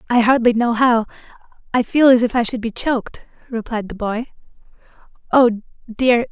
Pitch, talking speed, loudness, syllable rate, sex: 235 Hz, 160 wpm, -17 LUFS, 5.2 syllables/s, female